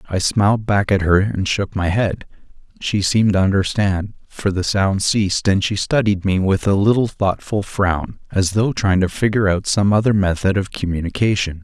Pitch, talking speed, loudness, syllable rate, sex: 100 Hz, 190 wpm, -18 LUFS, 5.0 syllables/s, male